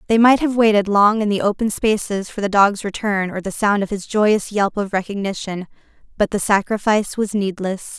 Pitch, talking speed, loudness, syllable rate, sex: 205 Hz, 205 wpm, -18 LUFS, 5.2 syllables/s, female